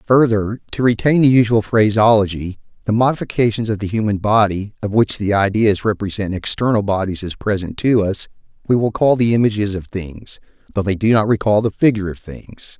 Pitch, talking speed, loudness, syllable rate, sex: 105 Hz, 185 wpm, -17 LUFS, 5.5 syllables/s, male